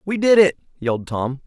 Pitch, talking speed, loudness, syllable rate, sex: 160 Hz, 205 wpm, -19 LUFS, 5.4 syllables/s, male